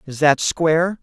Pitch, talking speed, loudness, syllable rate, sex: 160 Hz, 175 wpm, -17 LUFS, 4.5 syllables/s, male